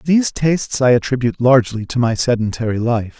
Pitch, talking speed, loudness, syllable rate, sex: 125 Hz, 170 wpm, -16 LUFS, 6.0 syllables/s, male